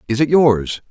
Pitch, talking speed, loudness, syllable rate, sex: 125 Hz, 200 wpm, -15 LUFS, 4.4 syllables/s, male